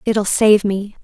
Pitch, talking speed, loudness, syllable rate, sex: 205 Hz, 175 wpm, -15 LUFS, 3.8 syllables/s, female